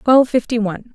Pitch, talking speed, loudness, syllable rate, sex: 235 Hz, 190 wpm, -17 LUFS, 7.1 syllables/s, female